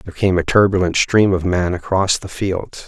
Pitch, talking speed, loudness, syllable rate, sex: 90 Hz, 210 wpm, -17 LUFS, 5.0 syllables/s, male